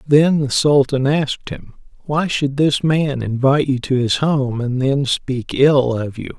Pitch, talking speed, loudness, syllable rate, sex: 135 Hz, 190 wpm, -17 LUFS, 4.1 syllables/s, male